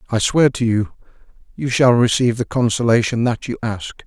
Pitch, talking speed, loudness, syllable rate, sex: 120 Hz, 175 wpm, -17 LUFS, 5.5 syllables/s, male